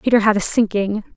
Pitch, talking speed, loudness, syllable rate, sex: 210 Hz, 205 wpm, -17 LUFS, 6.2 syllables/s, female